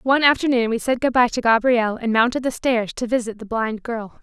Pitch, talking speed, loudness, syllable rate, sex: 240 Hz, 240 wpm, -20 LUFS, 5.5 syllables/s, female